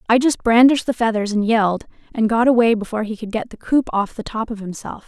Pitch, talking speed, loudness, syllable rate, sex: 225 Hz, 250 wpm, -18 LUFS, 6.3 syllables/s, female